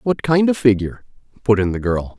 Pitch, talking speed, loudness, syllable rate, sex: 120 Hz, 220 wpm, -18 LUFS, 5.9 syllables/s, male